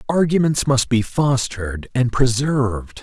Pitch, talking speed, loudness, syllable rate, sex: 125 Hz, 120 wpm, -19 LUFS, 4.3 syllables/s, male